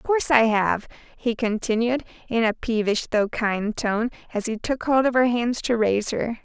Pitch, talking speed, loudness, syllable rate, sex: 230 Hz, 205 wpm, -23 LUFS, 5.1 syllables/s, female